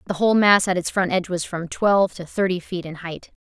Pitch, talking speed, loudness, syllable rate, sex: 185 Hz, 260 wpm, -21 LUFS, 6.0 syllables/s, female